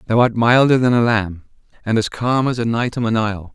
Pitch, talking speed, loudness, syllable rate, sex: 115 Hz, 255 wpm, -17 LUFS, 5.4 syllables/s, male